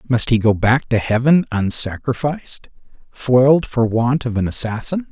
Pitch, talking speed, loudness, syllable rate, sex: 125 Hz, 150 wpm, -17 LUFS, 4.8 syllables/s, male